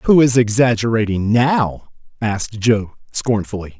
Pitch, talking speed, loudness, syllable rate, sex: 115 Hz, 110 wpm, -17 LUFS, 4.3 syllables/s, male